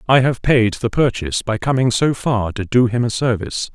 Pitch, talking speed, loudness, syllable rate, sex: 115 Hz, 225 wpm, -17 LUFS, 5.3 syllables/s, male